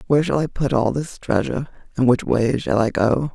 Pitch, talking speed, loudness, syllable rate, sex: 130 Hz, 235 wpm, -20 LUFS, 5.5 syllables/s, female